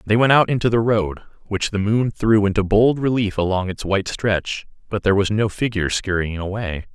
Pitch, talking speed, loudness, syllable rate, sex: 105 Hz, 205 wpm, -20 LUFS, 5.4 syllables/s, male